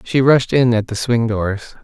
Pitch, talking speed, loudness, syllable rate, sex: 115 Hz, 230 wpm, -16 LUFS, 4.1 syllables/s, male